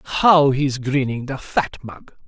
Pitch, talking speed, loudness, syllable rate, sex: 135 Hz, 160 wpm, -18 LUFS, 4.5 syllables/s, male